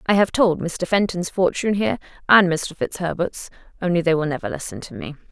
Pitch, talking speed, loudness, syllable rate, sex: 185 Hz, 190 wpm, -21 LUFS, 5.8 syllables/s, female